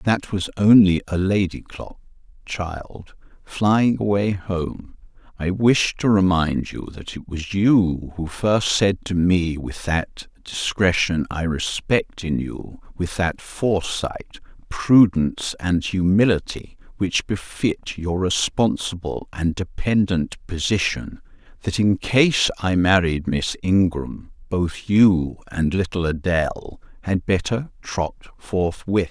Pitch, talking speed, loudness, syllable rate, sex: 90 Hz, 120 wpm, -21 LUFS, 3.5 syllables/s, male